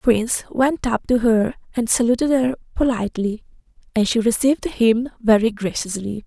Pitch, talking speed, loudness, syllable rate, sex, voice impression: 235 Hz, 155 wpm, -20 LUFS, 5.3 syllables/s, female, very masculine, slightly young, very thin, slightly relaxed, slightly weak, slightly dark, soft, muffled, slightly fluent, slightly raspy, very cute, very intellectual, refreshing, sincere, very calm, very friendly, very reassuring, very unique, very elegant, slightly wild, very sweet, slightly lively, slightly strict, slightly sharp, modest